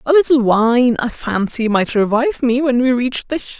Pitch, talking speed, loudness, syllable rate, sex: 250 Hz, 215 wpm, -16 LUFS, 5.0 syllables/s, female